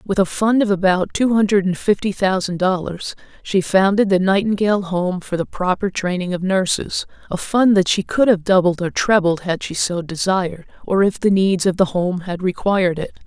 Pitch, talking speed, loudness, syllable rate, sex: 190 Hz, 200 wpm, -18 LUFS, 5.0 syllables/s, female